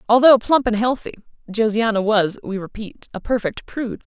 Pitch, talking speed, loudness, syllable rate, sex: 220 Hz, 160 wpm, -19 LUFS, 5.3 syllables/s, female